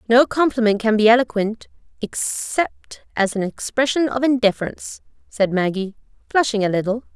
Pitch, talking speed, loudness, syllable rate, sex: 225 Hz, 135 wpm, -19 LUFS, 5.1 syllables/s, female